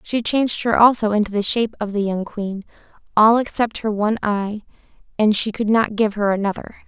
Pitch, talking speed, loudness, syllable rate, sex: 215 Hz, 200 wpm, -19 LUFS, 5.6 syllables/s, female